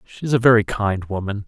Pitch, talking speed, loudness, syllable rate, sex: 105 Hz, 245 wpm, -19 LUFS, 5.8 syllables/s, male